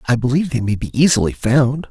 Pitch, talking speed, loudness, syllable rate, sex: 130 Hz, 220 wpm, -17 LUFS, 6.1 syllables/s, male